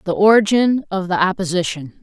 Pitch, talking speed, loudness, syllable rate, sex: 190 Hz, 150 wpm, -17 LUFS, 5.4 syllables/s, female